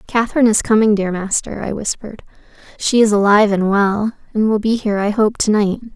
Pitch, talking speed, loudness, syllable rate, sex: 210 Hz, 200 wpm, -16 LUFS, 6.1 syllables/s, female